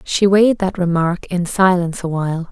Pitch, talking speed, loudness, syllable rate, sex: 180 Hz, 190 wpm, -16 LUFS, 5.4 syllables/s, female